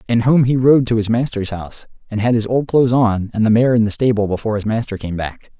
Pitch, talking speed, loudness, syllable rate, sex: 115 Hz, 270 wpm, -16 LUFS, 6.3 syllables/s, male